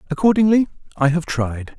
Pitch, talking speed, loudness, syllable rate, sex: 170 Hz, 135 wpm, -18 LUFS, 5.4 syllables/s, male